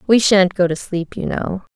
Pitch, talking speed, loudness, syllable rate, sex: 190 Hz, 240 wpm, -17 LUFS, 4.6 syllables/s, female